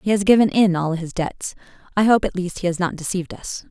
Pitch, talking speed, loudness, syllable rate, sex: 185 Hz, 260 wpm, -20 LUFS, 6.0 syllables/s, female